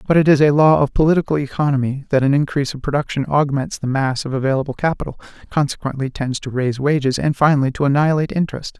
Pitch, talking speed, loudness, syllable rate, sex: 140 Hz, 200 wpm, -18 LUFS, 7.1 syllables/s, male